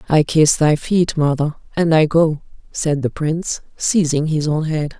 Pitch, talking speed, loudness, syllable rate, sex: 155 Hz, 180 wpm, -17 LUFS, 4.3 syllables/s, female